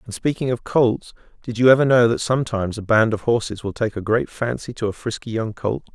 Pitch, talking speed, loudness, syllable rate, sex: 115 Hz, 240 wpm, -20 LUFS, 5.9 syllables/s, male